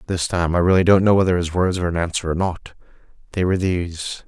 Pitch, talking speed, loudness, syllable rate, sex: 90 Hz, 240 wpm, -19 LUFS, 6.6 syllables/s, male